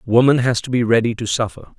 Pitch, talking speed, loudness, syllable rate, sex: 120 Hz, 235 wpm, -17 LUFS, 5.7 syllables/s, male